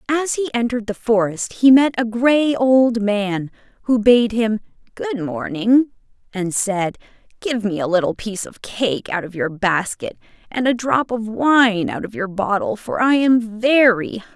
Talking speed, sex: 190 wpm, female